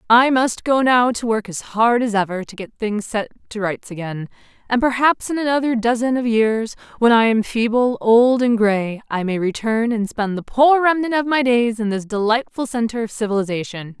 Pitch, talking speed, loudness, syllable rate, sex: 230 Hz, 205 wpm, -18 LUFS, 5.0 syllables/s, female